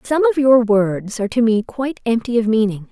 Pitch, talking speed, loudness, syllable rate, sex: 230 Hz, 225 wpm, -17 LUFS, 5.5 syllables/s, female